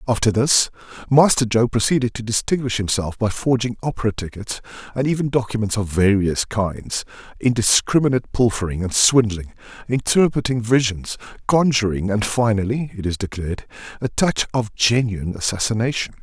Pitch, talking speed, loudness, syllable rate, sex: 115 Hz, 130 wpm, -19 LUFS, 5.4 syllables/s, male